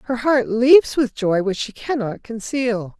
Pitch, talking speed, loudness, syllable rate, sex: 235 Hz, 180 wpm, -19 LUFS, 3.9 syllables/s, female